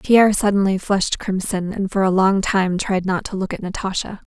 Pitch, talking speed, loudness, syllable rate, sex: 195 Hz, 210 wpm, -19 LUFS, 5.3 syllables/s, female